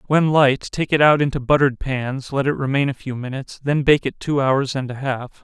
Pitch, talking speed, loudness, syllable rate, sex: 135 Hz, 245 wpm, -19 LUFS, 5.5 syllables/s, male